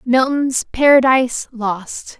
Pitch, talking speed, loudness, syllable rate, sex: 250 Hz, 80 wpm, -16 LUFS, 3.4 syllables/s, female